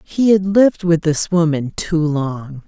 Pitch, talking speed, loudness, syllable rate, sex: 170 Hz, 180 wpm, -16 LUFS, 3.9 syllables/s, female